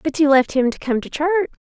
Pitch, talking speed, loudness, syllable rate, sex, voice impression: 290 Hz, 285 wpm, -18 LUFS, 5.4 syllables/s, female, feminine, adult-like, tensed, slightly bright, slightly muffled, fluent, intellectual, calm, friendly, reassuring, lively, kind